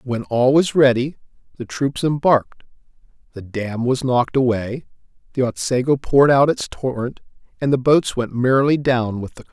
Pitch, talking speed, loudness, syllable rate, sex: 130 Hz, 170 wpm, -18 LUFS, 5.3 syllables/s, male